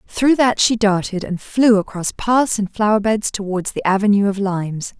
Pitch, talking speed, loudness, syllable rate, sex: 205 Hz, 180 wpm, -17 LUFS, 4.8 syllables/s, female